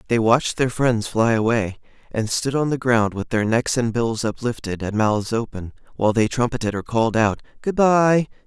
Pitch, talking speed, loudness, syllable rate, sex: 120 Hz, 200 wpm, -21 LUFS, 5.0 syllables/s, male